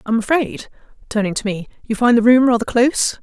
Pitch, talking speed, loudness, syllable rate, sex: 235 Hz, 205 wpm, -16 LUFS, 5.6 syllables/s, female